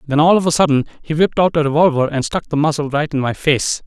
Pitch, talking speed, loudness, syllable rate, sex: 150 Hz, 280 wpm, -16 LUFS, 6.4 syllables/s, male